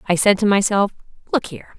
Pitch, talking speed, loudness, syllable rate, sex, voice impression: 200 Hz, 200 wpm, -18 LUFS, 6.7 syllables/s, female, very feminine, adult-like, very thin, tensed, slightly powerful, very bright, very soft, very clear, very fluent, cool, very intellectual, very refreshing, sincere, calm, very friendly, very reassuring, very unique, very elegant, wild, very sweet, very lively, very kind, slightly intense, slightly light